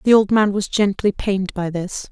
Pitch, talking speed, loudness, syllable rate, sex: 200 Hz, 225 wpm, -19 LUFS, 5.1 syllables/s, female